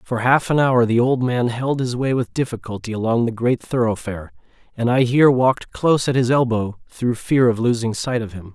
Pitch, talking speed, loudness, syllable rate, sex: 120 Hz, 220 wpm, -19 LUFS, 5.4 syllables/s, male